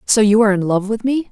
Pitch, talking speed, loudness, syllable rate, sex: 215 Hz, 320 wpm, -15 LUFS, 6.6 syllables/s, female